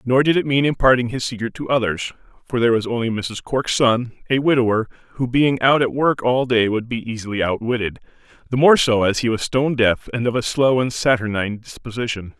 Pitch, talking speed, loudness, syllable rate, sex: 120 Hz, 215 wpm, -19 LUFS, 5.8 syllables/s, male